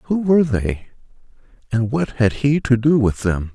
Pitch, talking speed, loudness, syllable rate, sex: 125 Hz, 185 wpm, -18 LUFS, 4.5 syllables/s, male